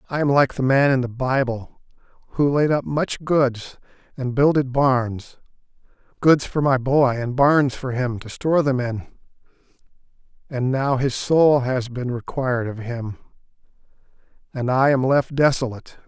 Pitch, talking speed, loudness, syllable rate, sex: 130 Hz, 155 wpm, -20 LUFS, 4.5 syllables/s, male